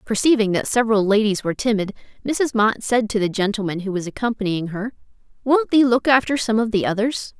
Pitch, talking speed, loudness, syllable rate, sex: 220 Hz, 195 wpm, -20 LUFS, 6.0 syllables/s, female